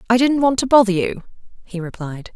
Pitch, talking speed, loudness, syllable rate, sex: 215 Hz, 205 wpm, -17 LUFS, 5.6 syllables/s, female